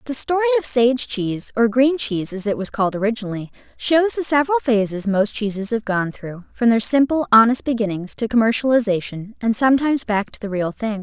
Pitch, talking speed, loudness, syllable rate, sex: 230 Hz, 195 wpm, -19 LUFS, 5.9 syllables/s, female